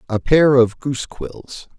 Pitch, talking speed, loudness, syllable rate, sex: 130 Hz, 170 wpm, -16 LUFS, 3.9 syllables/s, male